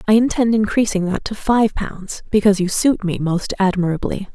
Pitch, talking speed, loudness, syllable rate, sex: 205 Hz, 180 wpm, -18 LUFS, 5.2 syllables/s, female